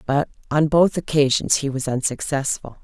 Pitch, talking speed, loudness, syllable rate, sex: 140 Hz, 150 wpm, -20 LUFS, 4.9 syllables/s, female